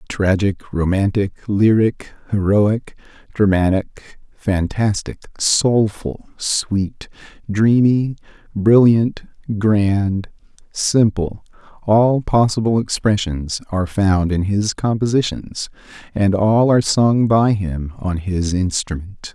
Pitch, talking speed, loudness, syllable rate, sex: 105 Hz, 90 wpm, -17 LUFS, 3.5 syllables/s, male